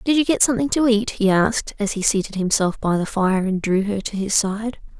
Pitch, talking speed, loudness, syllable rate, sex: 210 Hz, 250 wpm, -20 LUFS, 5.5 syllables/s, female